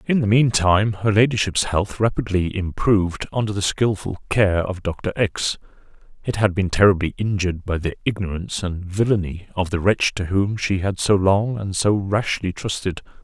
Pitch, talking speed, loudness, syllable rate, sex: 100 Hz, 170 wpm, -21 LUFS, 5.0 syllables/s, male